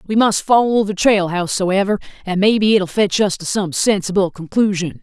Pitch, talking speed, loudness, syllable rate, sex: 200 Hz, 180 wpm, -16 LUFS, 5.0 syllables/s, female